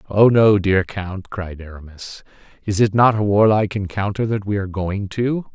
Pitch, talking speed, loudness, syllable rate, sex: 100 Hz, 185 wpm, -18 LUFS, 4.9 syllables/s, male